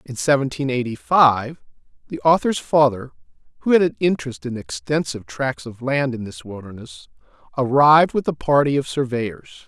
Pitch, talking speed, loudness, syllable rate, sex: 130 Hz, 155 wpm, -19 LUFS, 5.1 syllables/s, male